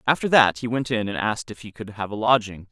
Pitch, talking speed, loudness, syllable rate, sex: 110 Hz, 290 wpm, -22 LUFS, 6.2 syllables/s, male